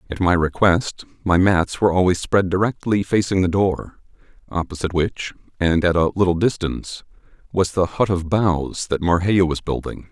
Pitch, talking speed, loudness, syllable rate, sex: 90 Hz, 165 wpm, -20 LUFS, 5.0 syllables/s, male